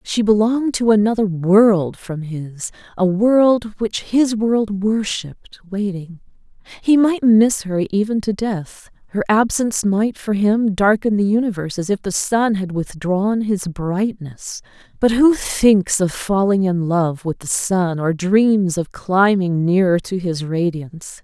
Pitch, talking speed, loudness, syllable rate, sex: 200 Hz, 155 wpm, -17 LUFS, 3.9 syllables/s, female